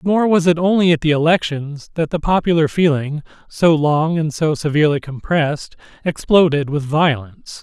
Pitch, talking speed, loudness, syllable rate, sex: 155 Hz, 155 wpm, -17 LUFS, 5.0 syllables/s, male